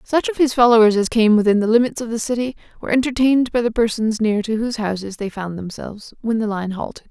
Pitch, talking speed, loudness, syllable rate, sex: 225 Hz, 235 wpm, -18 LUFS, 6.4 syllables/s, female